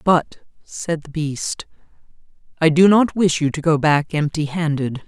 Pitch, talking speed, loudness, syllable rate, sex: 160 Hz, 165 wpm, -18 LUFS, 4.1 syllables/s, female